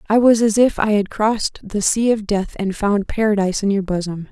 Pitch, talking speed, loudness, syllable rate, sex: 205 Hz, 235 wpm, -18 LUFS, 5.4 syllables/s, female